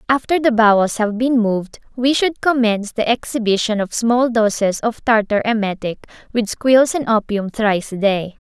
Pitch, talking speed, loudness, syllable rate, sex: 225 Hz, 170 wpm, -17 LUFS, 4.9 syllables/s, female